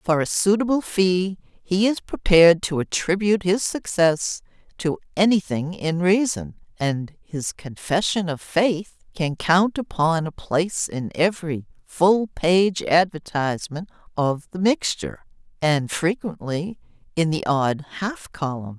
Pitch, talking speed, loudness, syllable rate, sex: 175 Hz, 130 wpm, -22 LUFS, 4.0 syllables/s, female